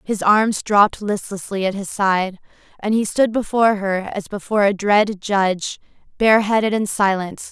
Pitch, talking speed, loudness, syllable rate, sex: 205 Hz, 160 wpm, -18 LUFS, 4.9 syllables/s, female